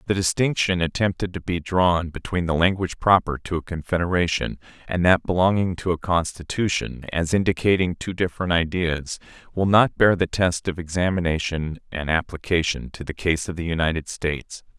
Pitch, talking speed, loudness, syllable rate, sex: 85 Hz, 160 wpm, -22 LUFS, 5.3 syllables/s, male